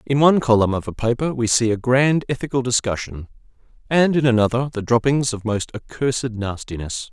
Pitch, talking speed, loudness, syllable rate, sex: 120 Hz, 175 wpm, -20 LUFS, 5.6 syllables/s, male